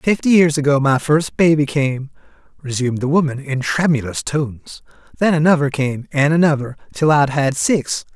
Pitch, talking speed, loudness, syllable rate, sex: 145 Hz, 160 wpm, -17 LUFS, 5.0 syllables/s, male